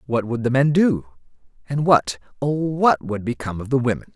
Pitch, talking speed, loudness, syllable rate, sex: 130 Hz, 190 wpm, -20 LUFS, 5.3 syllables/s, male